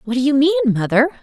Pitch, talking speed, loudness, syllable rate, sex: 270 Hz, 245 wpm, -16 LUFS, 7.0 syllables/s, female